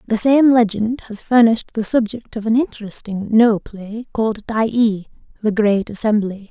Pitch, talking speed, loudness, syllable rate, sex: 220 Hz, 165 wpm, -17 LUFS, 4.5 syllables/s, female